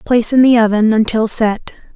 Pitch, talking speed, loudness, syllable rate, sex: 225 Hz, 185 wpm, -12 LUFS, 5.5 syllables/s, female